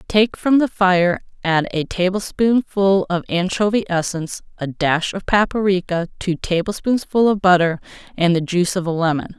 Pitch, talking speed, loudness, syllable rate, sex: 185 Hz, 155 wpm, -18 LUFS, 4.7 syllables/s, female